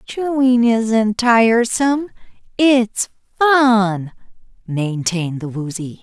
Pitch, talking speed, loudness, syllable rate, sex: 225 Hz, 80 wpm, -16 LUFS, 3.2 syllables/s, female